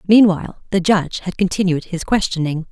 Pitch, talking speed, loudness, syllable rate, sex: 180 Hz, 155 wpm, -18 LUFS, 5.9 syllables/s, female